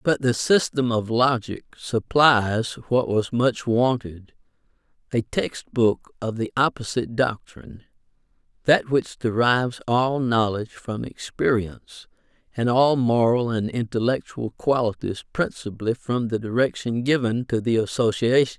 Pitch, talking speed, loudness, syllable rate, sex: 120 Hz, 120 wpm, -22 LUFS, 4.4 syllables/s, male